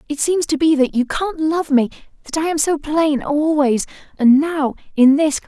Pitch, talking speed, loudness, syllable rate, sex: 295 Hz, 220 wpm, -17 LUFS, 4.8 syllables/s, female